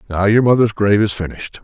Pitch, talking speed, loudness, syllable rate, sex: 105 Hz, 220 wpm, -15 LUFS, 7.0 syllables/s, male